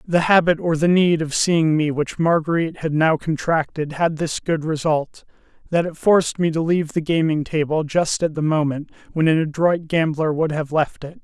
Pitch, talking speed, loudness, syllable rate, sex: 160 Hz, 205 wpm, -20 LUFS, 5.0 syllables/s, male